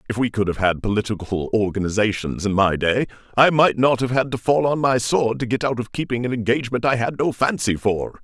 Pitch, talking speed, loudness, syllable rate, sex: 115 Hz, 235 wpm, -20 LUFS, 5.7 syllables/s, male